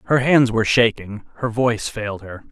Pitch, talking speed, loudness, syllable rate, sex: 115 Hz, 190 wpm, -19 LUFS, 5.7 syllables/s, male